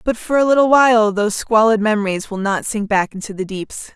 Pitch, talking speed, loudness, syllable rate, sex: 215 Hz, 230 wpm, -16 LUFS, 5.7 syllables/s, female